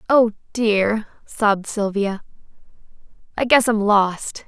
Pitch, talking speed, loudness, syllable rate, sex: 210 Hz, 105 wpm, -19 LUFS, 3.6 syllables/s, female